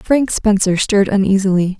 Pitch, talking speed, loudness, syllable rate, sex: 200 Hz, 135 wpm, -14 LUFS, 5.1 syllables/s, female